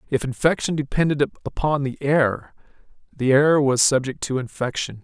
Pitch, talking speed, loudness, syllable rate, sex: 140 Hz, 145 wpm, -21 LUFS, 4.7 syllables/s, male